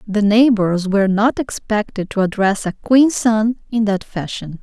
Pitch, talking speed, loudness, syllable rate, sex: 210 Hz, 170 wpm, -17 LUFS, 4.3 syllables/s, female